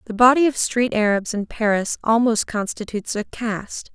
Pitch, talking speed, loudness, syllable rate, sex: 220 Hz, 165 wpm, -20 LUFS, 5.1 syllables/s, female